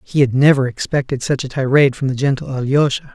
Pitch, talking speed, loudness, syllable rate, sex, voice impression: 135 Hz, 210 wpm, -16 LUFS, 6.2 syllables/s, male, masculine, adult-like, sincere, slightly calm, friendly, kind